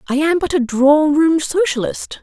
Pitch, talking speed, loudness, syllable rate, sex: 300 Hz, 190 wpm, -15 LUFS, 4.8 syllables/s, female